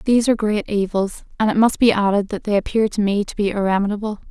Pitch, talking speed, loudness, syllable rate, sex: 205 Hz, 235 wpm, -19 LUFS, 6.6 syllables/s, female